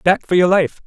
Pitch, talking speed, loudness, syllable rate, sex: 180 Hz, 280 wpm, -15 LUFS, 4.9 syllables/s, male